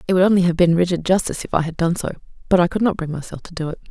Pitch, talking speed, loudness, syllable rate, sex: 175 Hz, 320 wpm, -19 LUFS, 7.9 syllables/s, female